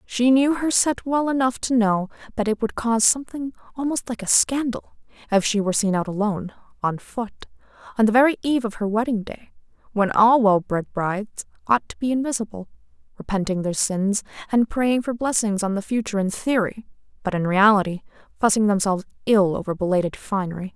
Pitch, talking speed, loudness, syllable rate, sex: 220 Hz, 180 wpm, -22 LUFS, 5.8 syllables/s, female